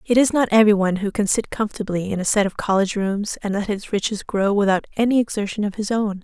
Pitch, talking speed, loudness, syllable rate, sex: 205 Hz, 250 wpm, -20 LUFS, 6.6 syllables/s, female